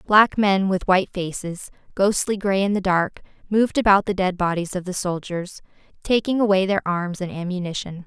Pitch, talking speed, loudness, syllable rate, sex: 190 Hz, 180 wpm, -21 LUFS, 5.2 syllables/s, female